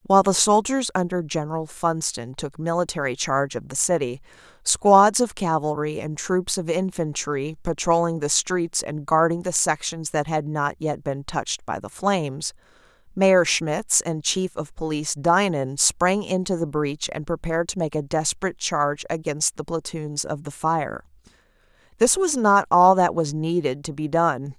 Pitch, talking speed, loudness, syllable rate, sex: 165 Hz, 170 wpm, -22 LUFS, 4.6 syllables/s, female